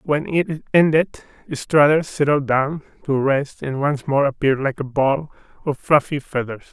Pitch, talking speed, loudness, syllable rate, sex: 140 Hz, 160 wpm, -19 LUFS, 4.3 syllables/s, male